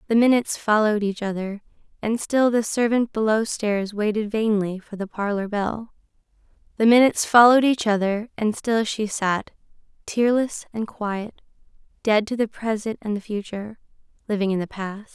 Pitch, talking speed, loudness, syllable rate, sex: 215 Hz, 160 wpm, -22 LUFS, 5.1 syllables/s, female